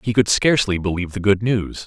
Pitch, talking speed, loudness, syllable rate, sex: 105 Hz, 225 wpm, -19 LUFS, 6.2 syllables/s, male